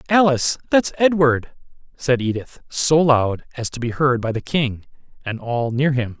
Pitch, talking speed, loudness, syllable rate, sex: 135 Hz, 175 wpm, -19 LUFS, 4.4 syllables/s, male